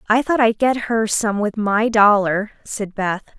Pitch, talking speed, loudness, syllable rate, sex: 215 Hz, 195 wpm, -18 LUFS, 4.1 syllables/s, female